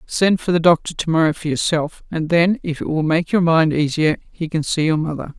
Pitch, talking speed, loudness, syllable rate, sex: 160 Hz, 245 wpm, -18 LUFS, 5.4 syllables/s, female